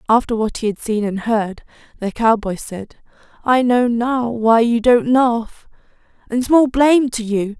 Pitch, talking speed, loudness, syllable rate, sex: 230 Hz, 175 wpm, -17 LUFS, 4.2 syllables/s, female